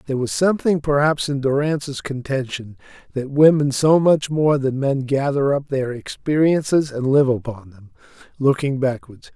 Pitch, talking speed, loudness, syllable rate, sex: 140 Hz, 155 wpm, -19 LUFS, 4.8 syllables/s, male